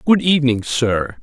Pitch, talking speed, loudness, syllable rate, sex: 135 Hz, 145 wpm, -16 LUFS, 4.6 syllables/s, male